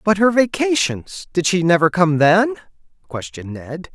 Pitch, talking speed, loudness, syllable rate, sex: 180 Hz, 135 wpm, -16 LUFS, 4.6 syllables/s, male